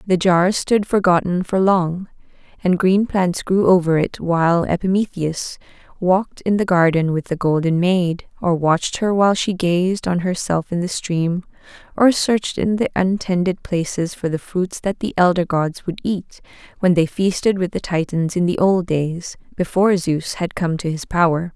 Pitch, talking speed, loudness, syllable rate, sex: 180 Hz, 180 wpm, -19 LUFS, 4.6 syllables/s, female